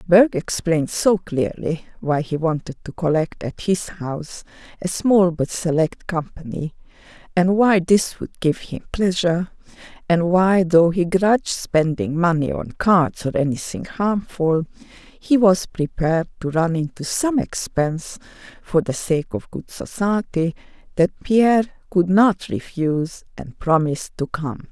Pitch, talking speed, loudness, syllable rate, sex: 175 Hz, 140 wpm, -20 LUFS, 4.2 syllables/s, female